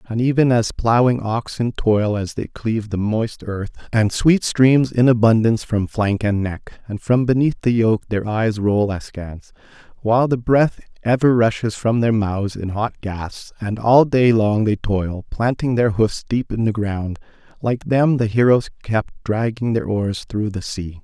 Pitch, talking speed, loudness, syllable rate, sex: 110 Hz, 185 wpm, -19 LUFS, 4.3 syllables/s, male